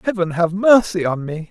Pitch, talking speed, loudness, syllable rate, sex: 185 Hz, 200 wpm, -17 LUFS, 5.1 syllables/s, male